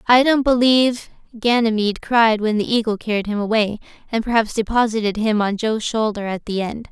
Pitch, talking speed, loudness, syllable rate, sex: 220 Hz, 180 wpm, -18 LUFS, 5.7 syllables/s, female